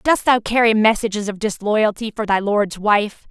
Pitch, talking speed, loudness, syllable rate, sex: 215 Hz, 180 wpm, -18 LUFS, 4.8 syllables/s, female